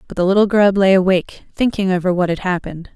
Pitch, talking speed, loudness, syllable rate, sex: 185 Hz, 225 wpm, -16 LUFS, 6.6 syllables/s, female